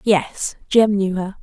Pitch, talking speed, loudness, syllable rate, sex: 200 Hz, 170 wpm, -19 LUFS, 3.3 syllables/s, female